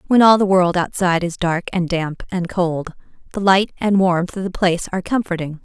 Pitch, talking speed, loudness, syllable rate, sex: 180 Hz, 215 wpm, -18 LUFS, 5.3 syllables/s, female